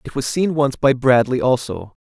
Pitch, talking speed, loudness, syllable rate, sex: 130 Hz, 205 wpm, -17 LUFS, 4.8 syllables/s, male